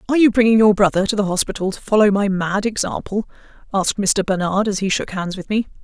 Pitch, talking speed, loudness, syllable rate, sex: 200 Hz, 225 wpm, -18 LUFS, 6.3 syllables/s, female